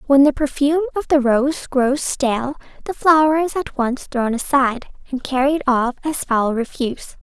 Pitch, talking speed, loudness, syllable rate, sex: 275 Hz, 175 wpm, -18 LUFS, 4.7 syllables/s, female